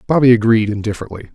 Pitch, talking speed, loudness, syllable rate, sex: 115 Hz, 135 wpm, -14 LUFS, 7.7 syllables/s, male